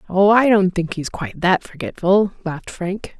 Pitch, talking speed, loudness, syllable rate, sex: 190 Hz, 190 wpm, -18 LUFS, 4.9 syllables/s, female